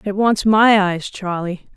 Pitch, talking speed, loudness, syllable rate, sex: 200 Hz, 170 wpm, -16 LUFS, 3.8 syllables/s, female